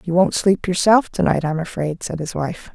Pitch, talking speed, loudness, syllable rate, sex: 175 Hz, 240 wpm, -19 LUFS, 4.9 syllables/s, female